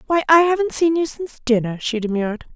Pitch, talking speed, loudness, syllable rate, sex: 280 Hz, 210 wpm, -19 LUFS, 6.5 syllables/s, female